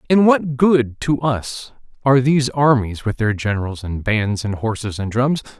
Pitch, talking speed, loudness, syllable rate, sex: 120 Hz, 180 wpm, -18 LUFS, 4.7 syllables/s, male